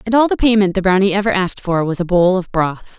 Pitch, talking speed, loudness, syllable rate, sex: 190 Hz, 280 wpm, -15 LUFS, 6.3 syllables/s, female